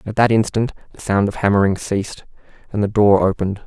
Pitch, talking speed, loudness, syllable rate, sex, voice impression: 105 Hz, 195 wpm, -18 LUFS, 6.3 syllables/s, male, masculine, adult-like, slightly dark, slightly fluent, slightly sincere, slightly kind